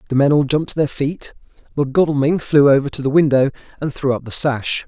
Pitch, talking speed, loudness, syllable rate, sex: 140 Hz, 235 wpm, -17 LUFS, 6.1 syllables/s, male